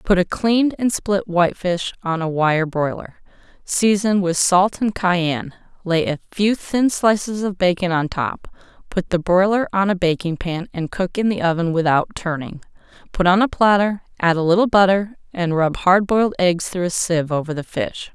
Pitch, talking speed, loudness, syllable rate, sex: 185 Hz, 190 wpm, -19 LUFS, 4.9 syllables/s, female